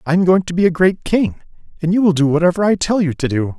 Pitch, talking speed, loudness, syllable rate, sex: 175 Hz, 300 wpm, -16 LUFS, 6.5 syllables/s, male